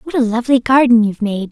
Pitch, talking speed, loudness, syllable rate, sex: 240 Hz, 235 wpm, -14 LUFS, 6.8 syllables/s, female